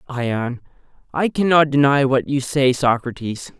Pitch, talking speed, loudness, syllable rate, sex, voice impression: 135 Hz, 135 wpm, -18 LUFS, 4.2 syllables/s, male, very feminine, adult-like, middle-aged, slightly thin, slightly tensed, powerful, slightly bright, slightly hard, clear, slightly fluent, slightly cool, slightly intellectual, slightly sincere, calm, slightly mature, slightly friendly, slightly reassuring, very unique, slightly elegant, wild, lively, strict